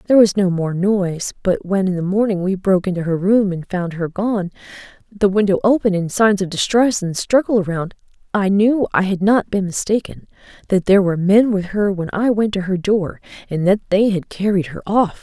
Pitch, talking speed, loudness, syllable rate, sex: 195 Hz, 215 wpm, -17 LUFS, 5.4 syllables/s, female